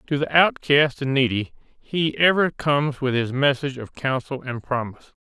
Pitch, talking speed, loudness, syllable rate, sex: 140 Hz, 170 wpm, -21 LUFS, 5.1 syllables/s, male